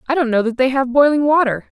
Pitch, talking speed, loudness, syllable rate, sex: 265 Hz, 265 wpm, -16 LUFS, 6.5 syllables/s, female